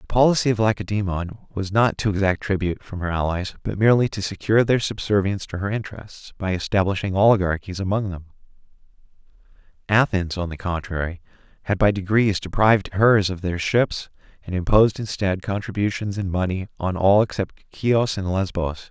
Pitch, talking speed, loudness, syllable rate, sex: 100 Hz, 160 wpm, -22 LUFS, 5.6 syllables/s, male